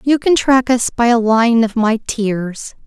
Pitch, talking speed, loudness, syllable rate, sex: 235 Hz, 210 wpm, -14 LUFS, 3.9 syllables/s, female